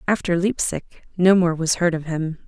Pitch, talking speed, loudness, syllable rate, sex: 175 Hz, 195 wpm, -20 LUFS, 4.7 syllables/s, female